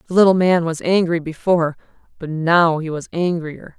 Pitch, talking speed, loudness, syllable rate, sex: 170 Hz, 175 wpm, -18 LUFS, 5.1 syllables/s, female